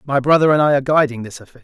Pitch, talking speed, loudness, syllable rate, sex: 135 Hz, 295 wpm, -15 LUFS, 7.8 syllables/s, male